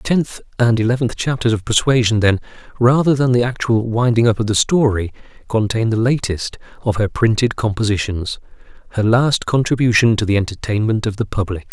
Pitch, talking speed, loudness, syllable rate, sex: 115 Hz, 170 wpm, -17 LUFS, 5.5 syllables/s, male